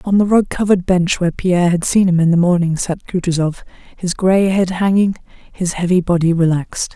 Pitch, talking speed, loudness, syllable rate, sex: 180 Hz, 200 wpm, -15 LUFS, 5.7 syllables/s, female